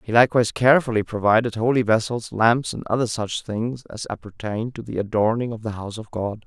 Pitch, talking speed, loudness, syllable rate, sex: 115 Hz, 195 wpm, -22 LUFS, 5.9 syllables/s, male